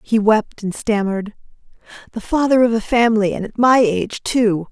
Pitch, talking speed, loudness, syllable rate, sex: 220 Hz, 180 wpm, -17 LUFS, 5.3 syllables/s, female